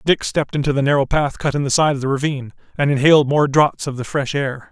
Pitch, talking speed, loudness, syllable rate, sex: 140 Hz, 265 wpm, -18 LUFS, 6.4 syllables/s, male